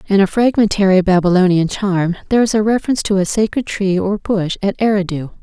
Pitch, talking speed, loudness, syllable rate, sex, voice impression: 195 Hz, 190 wpm, -15 LUFS, 6.0 syllables/s, female, feminine, adult-like, slightly weak, soft, fluent, slightly raspy, intellectual, calm, elegant, slightly sharp, modest